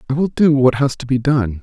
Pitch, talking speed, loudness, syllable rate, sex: 130 Hz, 295 wpm, -16 LUFS, 5.5 syllables/s, male